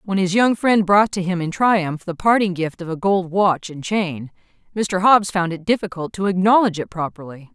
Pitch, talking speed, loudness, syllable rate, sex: 185 Hz, 215 wpm, -19 LUFS, 5.0 syllables/s, female